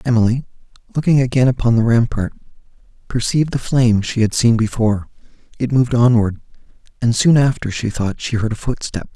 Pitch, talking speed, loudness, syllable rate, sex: 120 Hz, 165 wpm, -17 LUFS, 6.0 syllables/s, male